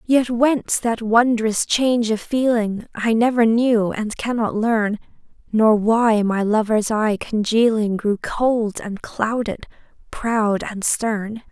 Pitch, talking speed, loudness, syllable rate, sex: 220 Hz, 135 wpm, -19 LUFS, 3.5 syllables/s, female